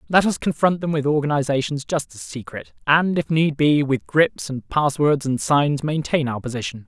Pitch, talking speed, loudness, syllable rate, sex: 145 Hz, 200 wpm, -20 LUFS, 4.9 syllables/s, male